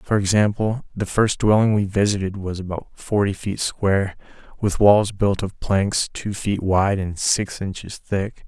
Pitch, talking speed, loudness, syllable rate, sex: 100 Hz, 170 wpm, -21 LUFS, 4.2 syllables/s, male